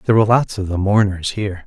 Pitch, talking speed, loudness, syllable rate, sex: 100 Hz, 255 wpm, -17 LUFS, 7.2 syllables/s, male